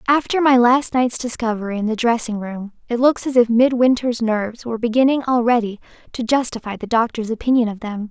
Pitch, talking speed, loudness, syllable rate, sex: 235 Hz, 185 wpm, -18 LUFS, 5.8 syllables/s, female